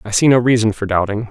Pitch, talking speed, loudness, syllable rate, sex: 110 Hz, 275 wpm, -15 LUFS, 6.6 syllables/s, male